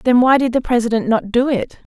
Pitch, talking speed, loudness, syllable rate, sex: 240 Hz, 245 wpm, -16 LUFS, 5.7 syllables/s, female